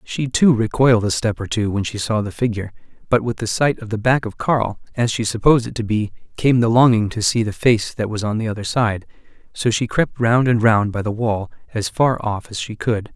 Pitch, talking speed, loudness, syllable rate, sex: 110 Hz, 250 wpm, -19 LUFS, 5.5 syllables/s, male